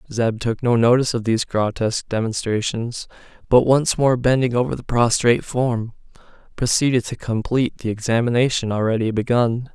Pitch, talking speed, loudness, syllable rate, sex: 120 Hz, 140 wpm, -20 LUFS, 5.5 syllables/s, male